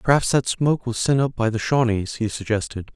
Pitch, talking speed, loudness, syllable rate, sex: 120 Hz, 225 wpm, -21 LUFS, 5.6 syllables/s, male